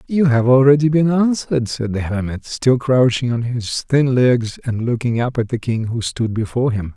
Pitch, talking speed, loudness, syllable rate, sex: 125 Hz, 205 wpm, -17 LUFS, 4.9 syllables/s, male